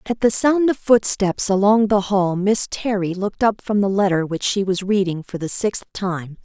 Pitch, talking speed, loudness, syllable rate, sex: 200 Hz, 215 wpm, -19 LUFS, 4.7 syllables/s, female